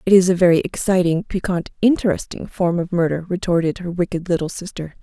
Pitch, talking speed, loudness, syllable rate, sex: 175 Hz, 180 wpm, -19 LUFS, 5.9 syllables/s, female